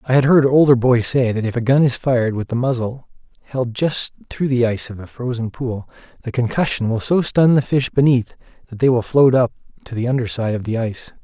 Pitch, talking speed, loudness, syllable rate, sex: 125 Hz, 235 wpm, -18 LUFS, 5.7 syllables/s, male